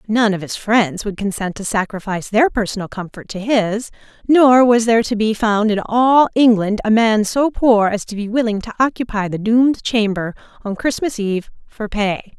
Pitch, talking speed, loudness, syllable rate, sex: 220 Hz, 195 wpm, -17 LUFS, 5.0 syllables/s, female